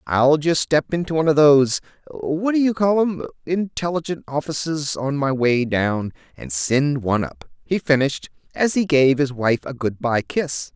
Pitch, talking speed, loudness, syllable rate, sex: 145 Hz, 175 wpm, -20 LUFS, 4.8 syllables/s, male